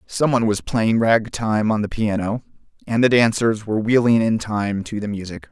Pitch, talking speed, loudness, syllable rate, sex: 110 Hz, 205 wpm, -19 LUFS, 5.1 syllables/s, male